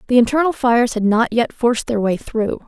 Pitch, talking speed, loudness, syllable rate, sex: 235 Hz, 225 wpm, -17 LUFS, 5.7 syllables/s, female